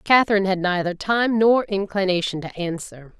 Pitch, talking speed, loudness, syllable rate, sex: 195 Hz, 150 wpm, -21 LUFS, 5.2 syllables/s, female